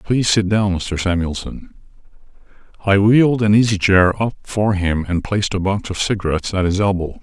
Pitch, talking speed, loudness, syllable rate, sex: 100 Hz, 185 wpm, -17 LUFS, 5.4 syllables/s, male